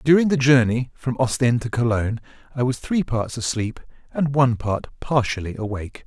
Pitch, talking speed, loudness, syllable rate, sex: 125 Hz, 170 wpm, -22 LUFS, 5.4 syllables/s, male